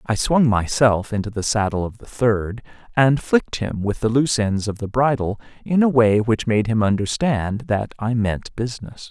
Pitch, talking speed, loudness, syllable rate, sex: 115 Hz, 200 wpm, -20 LUFS, 4.8 syllables/s, male